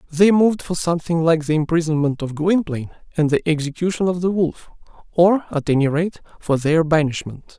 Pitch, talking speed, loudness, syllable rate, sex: 165 Hz, 175 wpm, -19 LUFS, 5.6 syllables/s, male